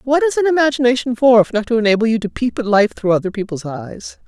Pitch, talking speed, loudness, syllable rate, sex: 235 Hz, 255 wpm, -16 LUFS, 6.4 syllables/s, female